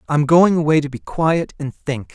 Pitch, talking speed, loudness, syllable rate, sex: 150 Hz, 225 wpm, -18 LUFS, 4.6 syllables/s, male